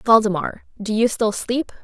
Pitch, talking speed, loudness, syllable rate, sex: 220 Hz, 165 wpm, -20 LUFS, 4.4 syllables/s, female